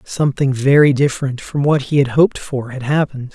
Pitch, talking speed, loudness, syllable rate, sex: 140 Hz, 195 wpm, -16 LUFS, 5.9 syllables/s, male